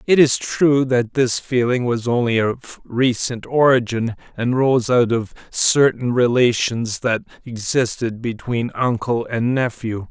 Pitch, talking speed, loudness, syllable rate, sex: 120 Hz, 135 wpm, -19 LUFS, 3.9 syllables/s, male